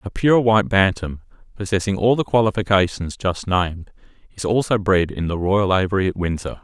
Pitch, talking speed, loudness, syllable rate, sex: 100 Hz, 170 wpm, -19 LUFS, 5.5 syllables/s, male